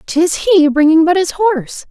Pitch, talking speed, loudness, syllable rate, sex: 330 Hz, 190 wpm, -12 LUFS, 4.9 syllables/s, female